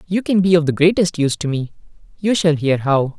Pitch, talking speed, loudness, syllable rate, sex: 165 Hz, 225 wpm, -17 LUFS, 5.8 syllables/s, male